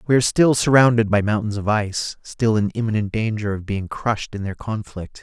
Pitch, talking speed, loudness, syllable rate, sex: 110 Hz, 205 wpm, -20 LUFS, 5.6 syllables/s, male